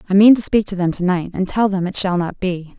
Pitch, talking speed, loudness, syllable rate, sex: 190 Hz, 325 wpm, -17 LUFS, 5.9 syllables/s, female